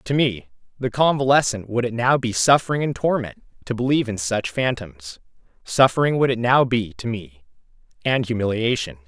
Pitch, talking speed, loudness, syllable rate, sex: 115 Hz, 165 wpm, -21 LUFS, 5.3 syllables/s, male